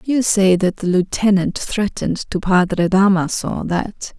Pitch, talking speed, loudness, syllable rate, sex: 190 Hz, 145 wpm, -17 LUFS, 4.2 syllables/s, female